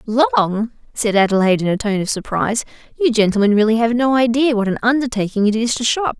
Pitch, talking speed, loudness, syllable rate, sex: 225 Hz, 205 wpm, -17 LUFS, 6.6 syllables/s, female